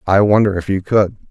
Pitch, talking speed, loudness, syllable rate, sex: 100 Hz, 230 wpm, -15 LUFS, 5.7 syllables/s, male